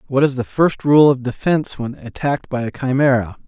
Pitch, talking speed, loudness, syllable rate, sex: 130 Hz, 205 wpm, -17 LUFS, 5.6 syllables/s, male